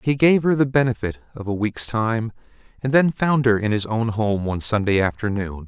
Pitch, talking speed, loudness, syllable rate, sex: 115 Hz, 210 wpm, -20 LUFS, 5.2 syllables/s, male